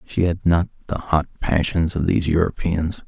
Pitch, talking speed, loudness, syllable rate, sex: 85 Hz, 175 wpm, -21 LUFS, 4.9 syllables/s, male